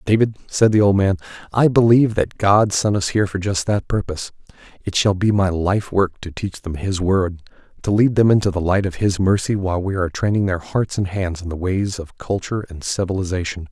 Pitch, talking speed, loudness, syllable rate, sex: 95 Hz, 215 wpm, -19 LUFS, 5.6 syllables/s, male